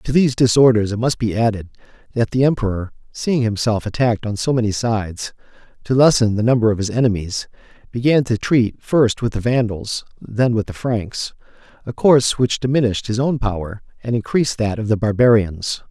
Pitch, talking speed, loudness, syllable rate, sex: 115 Hz, 180 wpm, -18 LUFS, 5.5 syllables/s, male